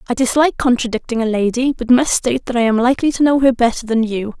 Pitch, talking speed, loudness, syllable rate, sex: 245 Hz, 245 wpm, -16 LUFS, 6.7 syllables/s, female